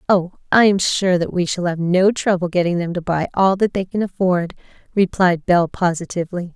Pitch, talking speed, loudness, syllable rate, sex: 180 Hz, 200 wpm, -18 LUFS, 5.4 syllables/s, female